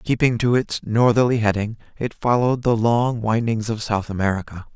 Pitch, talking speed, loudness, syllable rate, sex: 115 Hz, 165 wpm, -20 LUFS, 5.3 syllables/s, male